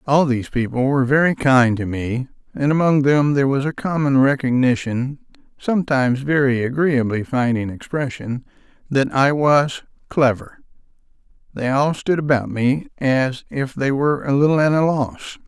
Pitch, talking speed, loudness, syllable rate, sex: 135 Hz, 145 wpm, -19 LUFS, 4.8 syllables/s, male